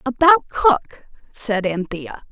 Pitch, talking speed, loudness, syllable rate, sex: 240 Hz, 105 wpm, -18 LUFS, 3.2 syllables/s, female